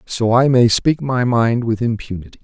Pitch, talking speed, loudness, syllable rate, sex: 120 Hz, 195 wpm, -16 LUFS, 4.8 syllables/s, male